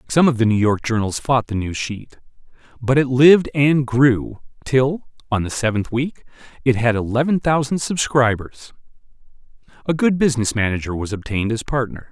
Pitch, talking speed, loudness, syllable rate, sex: 125 Hz, 165 wpm, -19 LUFS, 5.2 syllables/s, male